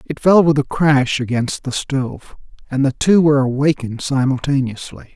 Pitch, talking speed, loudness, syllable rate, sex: 135 Hz, 165 wpm, -17 LUFS, 5.2 syllables/s, male